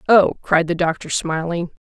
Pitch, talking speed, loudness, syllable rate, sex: 170 Hz, 165 wpm, -19 LUFS, 4.6 syllables/s, female